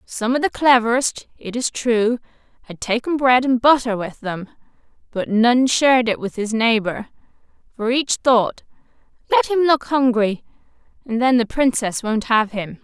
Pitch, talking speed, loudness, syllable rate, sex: 240 Hz, 165 wpm, -18 LUFS, 4.4 syllables/s, female